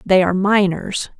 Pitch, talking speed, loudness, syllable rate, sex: 190 Hz, 150 wpm, -17 LUFS, 4.9 syllables/s, female